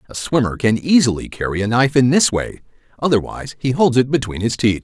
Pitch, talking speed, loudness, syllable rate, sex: 120 Hz, 210 wpm, -17 LUFS, 6.2 syllables/s, male